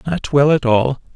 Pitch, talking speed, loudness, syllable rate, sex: 135 Hz, 210 wpm, -16 LUFS, 4.4 syllables/s, male